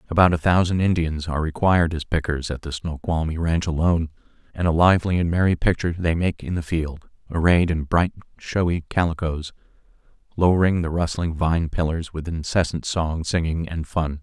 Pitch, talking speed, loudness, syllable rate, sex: 85 Hz, 170 wpm, -22 LUFS, 5.4 syllables/s, male